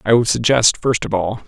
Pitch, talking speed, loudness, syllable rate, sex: 115 Hz, 245 wpm, -16 LUFS, 5.2 syllables/s, male